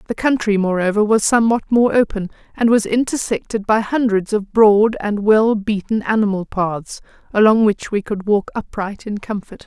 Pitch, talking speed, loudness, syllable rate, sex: 210 Hz, 170 wpm, -17 LUFS, 4.9 syllables/s, female